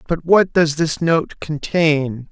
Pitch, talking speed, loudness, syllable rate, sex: 155 Hz, 155 wpm, -17 LUFS, 3.3 syllables/s, male